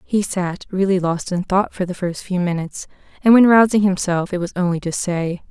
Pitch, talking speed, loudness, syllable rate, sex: 185 Hz, 220 wpm, -18 LUFS, 5.2 syllables/s, female